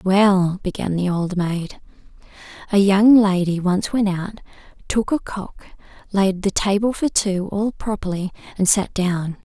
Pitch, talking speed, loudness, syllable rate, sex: 195 Hz, 150 wpm, -19 LUFS, 4.2 syllables/s, female